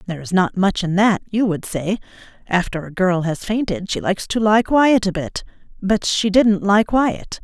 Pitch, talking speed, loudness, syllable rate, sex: 195 Hz, 210 wpm, -18 LUFS, 4.7 syllables/s, female